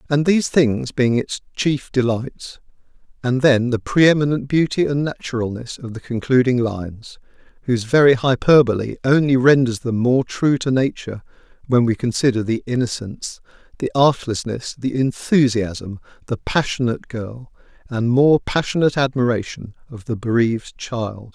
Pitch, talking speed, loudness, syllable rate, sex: 125 Hz, 135 wpm, -19 LUFS, 4.9 syllables/s, male